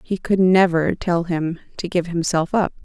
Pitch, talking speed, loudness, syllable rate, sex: 175 Hz, 190 wpm, -20 LUFS, 4.4 syllables/s, female